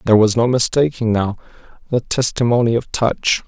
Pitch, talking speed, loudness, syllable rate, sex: 115 Hz, 155 wpm, -17 LUFS, 5.4 syllables/s, male